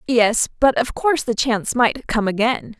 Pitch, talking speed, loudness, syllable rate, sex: 235 Hz, 195 wpm, -19 LUFS, 4.9 syllables/s, female